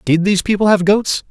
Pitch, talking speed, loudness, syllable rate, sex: 195 Hz, 230 wpm, -14 LUFS, 6.0 syllables/s, male